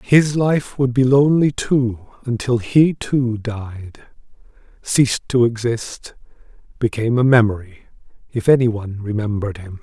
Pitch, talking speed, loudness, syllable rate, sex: 120 Hz, 115 wpm, -18 LUFS, 4.5 syllables/s, male